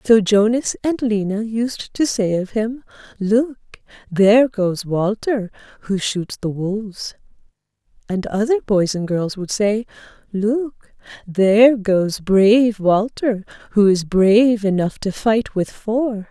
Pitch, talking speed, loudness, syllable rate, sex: 210 Hz, 135 wpm, -18 LUFS, 3.8 syllables/s, female